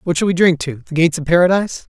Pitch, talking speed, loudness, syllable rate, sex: 170 Hz, 275 wpm, -15 LUFS, 7.6 syllables/s, male